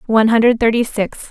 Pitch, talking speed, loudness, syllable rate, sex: 225 Hz, 185 wpm, -15 LUFS, 6.1 syllables/s, female